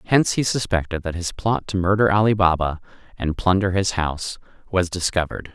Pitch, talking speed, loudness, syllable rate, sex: 95 Hz, 175 wpm, -21 LUFS, 5.7 syllables/s, male